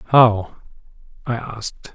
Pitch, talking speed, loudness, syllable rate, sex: 115 Hz, 90 wpm, -20 LUFS, 3.2 syllables/s, male